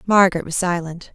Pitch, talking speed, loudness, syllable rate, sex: 180 Hz, 155 wpm, -19 LUFS, 5.7 syllables/s, female